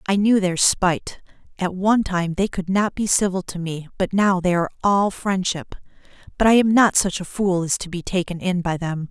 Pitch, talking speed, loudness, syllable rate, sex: 185 Hz, 225 wpm, -20 LUFS, 5.2 syllables/s, female